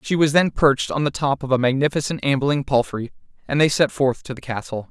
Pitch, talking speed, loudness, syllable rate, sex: 140 Hz, 230 wpm, -20 LUFS, 5.8 syllables/s, male